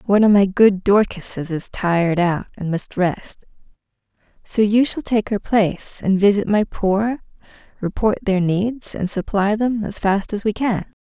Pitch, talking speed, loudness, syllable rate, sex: 200 Hz, 175 wpm, -19 LUFS, 4.4 syllables/s, female